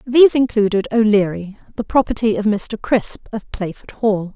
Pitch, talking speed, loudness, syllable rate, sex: 215 Hz, 150 wpm, -17 LUFS, 4.9 syllables/s, female